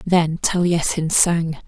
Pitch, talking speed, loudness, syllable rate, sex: 165 Hz, 110 wpm, -18 LUFS, 3.4 syllables/s, female